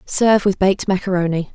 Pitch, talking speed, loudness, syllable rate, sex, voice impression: 190 Hz, 155 wpm, -17 LUFS, 6.3 syllables/s, female, feminine, adult-like, slightly tensed, slightly dark, soft, clear, fluent, intellectual, calm, friendly, reassuring, elegant, lively, slightly sharp